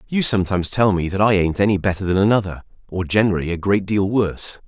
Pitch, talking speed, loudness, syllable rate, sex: 100 Hz, 205 wpm, -19 LUFS, 6.7 syllables/s, male